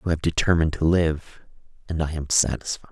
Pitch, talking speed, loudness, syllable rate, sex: 80 Hz, 185 wpm, -23 LUFS, 5.9 syllables/s, male